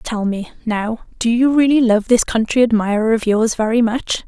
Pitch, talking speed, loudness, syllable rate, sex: 230 Hz, 195 wpm, -16 LUFS, 4.9 syllables/s, female